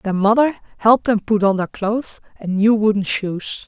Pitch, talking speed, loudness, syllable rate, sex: 210 Hz, 195 wpm, -18 LUFS, 5.0 syllables/s, female